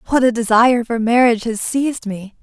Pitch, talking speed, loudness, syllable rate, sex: 235 Hz, 200 wpm, -16 LUFS, 6.1 syllables/s, female